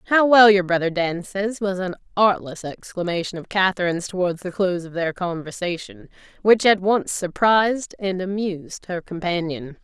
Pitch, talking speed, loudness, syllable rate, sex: 185 Hz, 155 wpm, -21 LUFS, 5.0 syllables/s, female